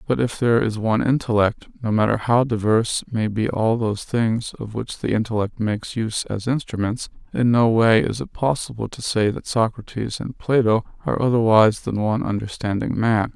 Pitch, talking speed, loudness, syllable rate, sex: 115 Hz, 185 wpm, -21 LUFS, 5.4 syllables/s, male